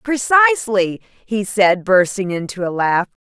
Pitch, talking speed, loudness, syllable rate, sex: 210 Hz, 130 wpm, -16 LUFS, 4.1 syllables/s, female